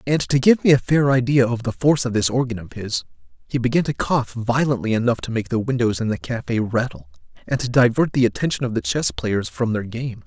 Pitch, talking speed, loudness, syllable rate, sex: 120 Hz, 240 wpm, -20 LUFS, 5.7 syllables/s, male